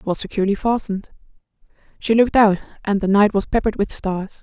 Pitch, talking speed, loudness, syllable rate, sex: 205 Hz, 190 wpm, -19 LUFS, 6.8 syllables/s, female